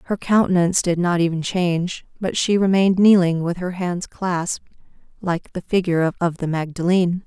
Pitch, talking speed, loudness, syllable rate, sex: 180 Hz, 165 wpm, -20 LUFS, 5.4 syllables/s, female